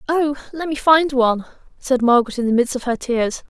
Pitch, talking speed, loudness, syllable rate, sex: 260 Hz, 220 wpm, -18 LUFS, 5.7 syllables/s, female